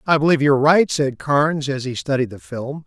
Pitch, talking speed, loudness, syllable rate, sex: 140 Hz, 230 wpm, -18 LUFS, 5.9 syllables/s, male